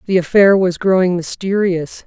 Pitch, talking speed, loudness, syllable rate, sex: 185 Hz, 145 wpm, -15 LUFS, 4.7 syllables/s, female